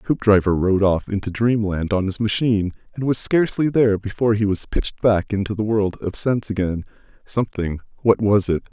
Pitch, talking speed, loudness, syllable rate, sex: 105 Hz, 170 wpm, -20 LUFS, 5.8 syllables/s, male